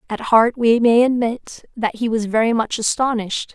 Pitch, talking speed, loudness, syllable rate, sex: 230 Hz, 185 wpm, -18 LUFS, 4.8 syllables/s, female